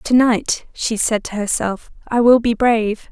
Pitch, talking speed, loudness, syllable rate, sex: 225 Hz, 190 wpm, -17 LUFS, 4.2 syllables/s, female